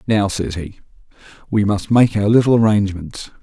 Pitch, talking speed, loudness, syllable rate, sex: 100 Hz, 160 wpm, -16 LUFS, 5.2 syllables/s, male